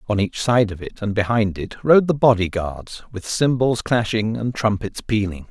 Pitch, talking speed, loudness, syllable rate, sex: 110 Hz, 195 wpm, -20 LUFS, 4.7 syllables/s, male